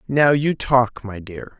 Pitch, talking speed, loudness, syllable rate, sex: 125 Hz, 190 wpm, -18 LUFS, 3.5 syllables/s, male